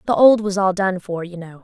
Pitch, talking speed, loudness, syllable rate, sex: 190 Hz, 295 wpm, -18 LUFS, 5.4 syllables/s, female